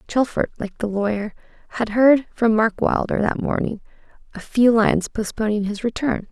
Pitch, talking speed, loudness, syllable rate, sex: 220 Hz, 150 wpm, -20 LUFS, 5.1 syllables/s, female